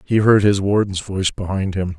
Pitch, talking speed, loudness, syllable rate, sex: 95 Hz, 210 wpm, -18 LUFS, 5.3 syllables/s, male